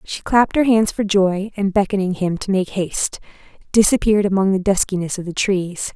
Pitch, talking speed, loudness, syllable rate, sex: 195 Hz, 190 wpm, -18 LUFS, 5.5 syllables/s, female